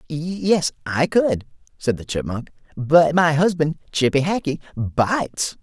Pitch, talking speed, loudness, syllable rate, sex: 155 Hz, 130 wpm, -20 LUFS, 3.8 syllables/s, male